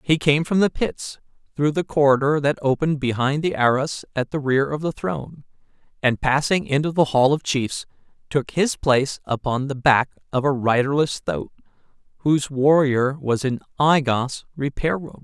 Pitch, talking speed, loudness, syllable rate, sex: 140 Hz, 175 wpm, -21 LUFS, 4.8 syllables/s, male